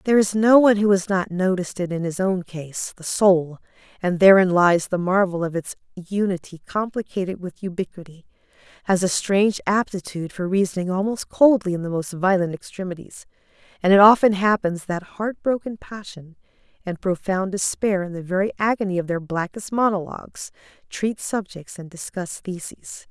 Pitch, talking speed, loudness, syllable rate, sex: 190 Hz, 155 wpm, -21 LUFS, 5.2 syllables/s, female